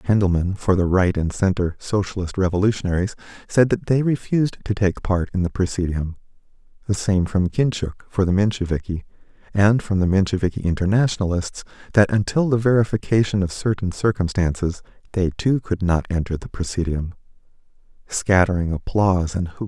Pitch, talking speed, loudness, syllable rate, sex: 95 Hz, 145 wpm, -21 LUFS, 5.5 syllables/s, male